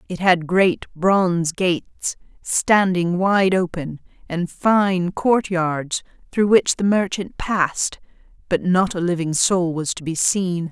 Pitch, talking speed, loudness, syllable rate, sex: 180 Hz, 145 wpm, -20 LUFS, 3.6 syllables/s, female